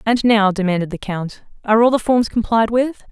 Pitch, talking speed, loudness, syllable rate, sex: 215 Hz, 210 wpm, -17 LUFS, 5.4 syllables/s, female